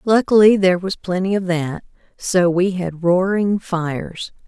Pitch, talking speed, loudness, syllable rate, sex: 185 Hz, 150 wpm, -18 LUFS, 4.3 syllables/s, female